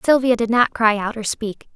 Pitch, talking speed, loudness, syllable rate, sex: 225 Hz, 240 wpm, -18 LUFS, 5.0 syllables/s, female